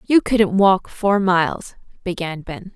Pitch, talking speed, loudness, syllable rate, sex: 190 Hz, 150 wpm, -18 LUFS, 3.9 syllables/s, female